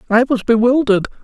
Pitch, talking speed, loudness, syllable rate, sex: 235 Hz, 145 wpm, -14 LUFS, 6.7 syllables/s, male